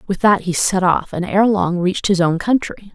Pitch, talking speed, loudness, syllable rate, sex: 190 Hz, 245 wpm, -17 LUFS, 5.0 syllables/s, female